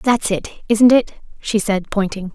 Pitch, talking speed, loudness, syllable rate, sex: 210 Hz, 180 wpm, -17 LUFS, 4.5 syllables/s, female